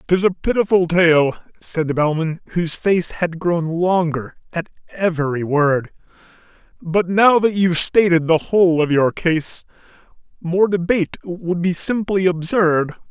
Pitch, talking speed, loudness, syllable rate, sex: 170 Hz, 140 wpm, -18 LUFS, 4.3 syllables/s, male